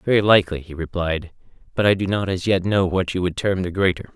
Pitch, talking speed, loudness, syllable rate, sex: 95 Hz, 245 wpm, -21 LUFS, 6.1 syllables/s, male